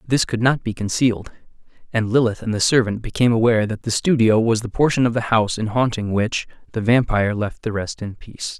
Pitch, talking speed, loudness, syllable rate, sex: 115 Hz, 215 wpm, -19 LUFS, 6.0 syllables/s, male